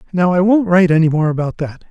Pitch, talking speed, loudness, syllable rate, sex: 175 Hz, 250 wpm, -14 LUFS, 6.8 syllables/s, male